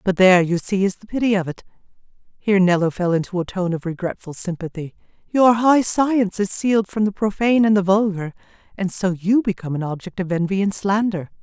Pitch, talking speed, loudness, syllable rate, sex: 195 Hz, 195 wpm, -19 LUFS, 6.0 syllables/s, female